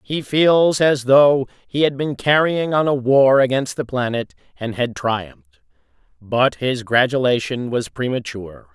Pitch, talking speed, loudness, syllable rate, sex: 130 Hz, 150 wpm, -18 LUFS, 4.2 syllables/s, male